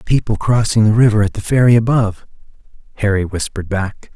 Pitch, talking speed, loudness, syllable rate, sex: 110 Hz, 160 wpm, -15 LUFS, 6.0 syllables/s, male